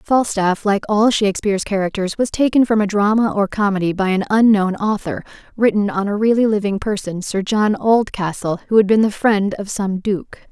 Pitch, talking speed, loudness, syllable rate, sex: 205 Hz, 190 wpm, -17 LUFS, 5.2 syllables/s, female